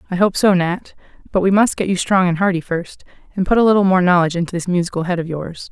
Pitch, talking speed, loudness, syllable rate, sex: 180 Hz, 265 wpm, -17 LUFS, 6.6 syllables/s, female